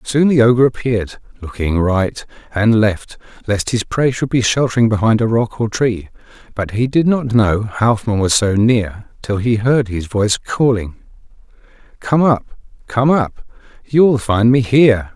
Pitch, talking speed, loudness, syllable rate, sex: 115 Hz, 170 wpm, -15 LUFS, 4.5 syllables/s, male